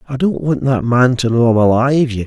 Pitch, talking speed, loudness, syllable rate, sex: 125 Hz, 240 wpm, -14 LUFS, 5.6 syllables/s, male